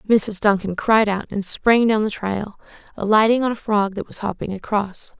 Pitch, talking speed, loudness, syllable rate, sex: 210 Hz, 195 wpm, -20 LUFS, 4.8 syllables/s, female